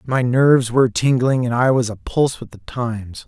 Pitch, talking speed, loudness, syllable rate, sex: 125 Hz, 220 wpm, -17 LUFS, 5.4 syllables/s, male